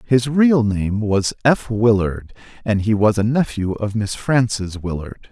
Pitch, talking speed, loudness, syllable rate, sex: 110 Hz, 170 wpm, -18 LUFS, 4.0 syllables/s, male